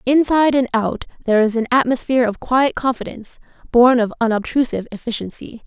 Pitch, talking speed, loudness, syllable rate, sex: 240 Hz, 150 wpm, -17 LUFS, 6.3 syllables/s, female